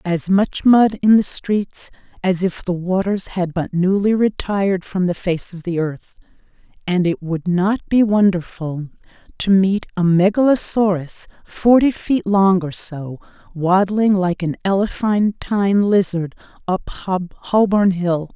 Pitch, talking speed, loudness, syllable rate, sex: 190 Hz, 140 wpm, -18 LUFS, 4.1 syllables/s, female